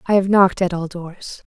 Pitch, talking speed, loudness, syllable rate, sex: 185 Hz, 240 wpm, -17 LUFS, 5.3 syllables/s, female